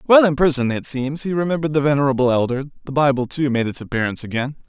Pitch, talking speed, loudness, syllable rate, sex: 140 Hz, 220 wpm, -19 LUFS, 7.1 syllables/s, male